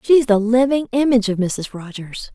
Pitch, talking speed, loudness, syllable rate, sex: 230 Hz, 180 wpm, -17 LUFS, 5.0 syllables/s, female